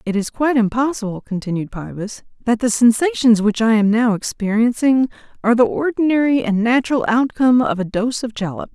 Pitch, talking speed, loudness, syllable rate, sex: 230 Hz, 170 wpm, -17 LUFS, 5.7 syllables/s, female